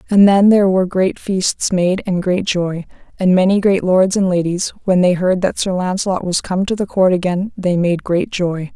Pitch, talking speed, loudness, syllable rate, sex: 185 Hz, 220 wpm, -16 LUFS, 4.8 syllables/s, female